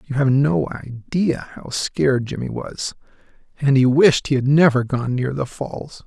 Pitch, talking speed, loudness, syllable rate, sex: 135 Hz, 180 wpm, -19 LUFS, 4.3 syllables/s, male